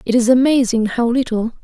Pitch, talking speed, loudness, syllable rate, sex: 240 Hz, 185 wpm, -16 LUFS, 5.4 syllables/s, female